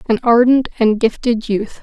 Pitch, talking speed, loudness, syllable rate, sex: 230 Hz, 165 wpm, -15 LUFS, 4.6 syllables/s, female